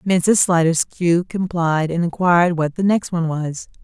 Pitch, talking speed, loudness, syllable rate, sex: 170 Hz, 155 wpm, -18 LUFS, 4.4 syllables/s, female